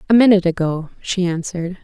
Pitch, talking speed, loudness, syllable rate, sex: 185 Hz, 165 wpm, -18 LUFS, 6.6 syllables/s, female